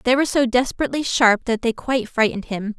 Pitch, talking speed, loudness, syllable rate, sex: 240 Hz, 215 wpm, -20 LUFS, 6.7 syllables/s, female